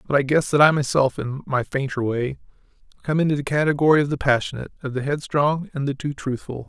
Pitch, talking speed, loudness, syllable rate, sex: 140 Hz, 215 wpm, -22 LUFS, 6.2 syllables/s, male